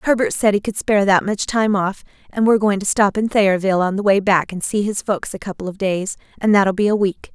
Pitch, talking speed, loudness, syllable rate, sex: 200 Hz, 270 wpm, -18 LUFS, 5.8 syllables/s, female